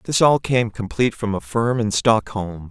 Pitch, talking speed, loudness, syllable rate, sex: 110 Hz, 200 wpm, -20 LUFS, 4.7 syllables/s, male